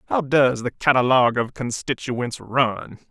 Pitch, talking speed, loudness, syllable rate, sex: 130 Hz, 135 wpm, -21 LUFS, 4.3 syllables/s, male